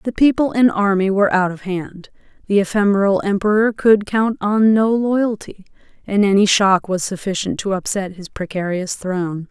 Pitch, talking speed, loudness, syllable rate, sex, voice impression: 200 Hz, 165 wpm, -17 LUFS, 4.9 syllables/s, female, very feminine, adult-like, very thin, powerful, very bright, soft, very clear, fluent, slightly raspy, very cute, intellectual, very refreshing, very sincere, calm, very mature, friendly, very unique, elegant, slightly wild, very sweet, lively, kind